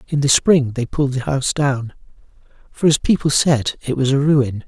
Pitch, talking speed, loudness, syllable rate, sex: 135 Hz, 205 wpm, -17 LUFS, 5.1 syllables/s, male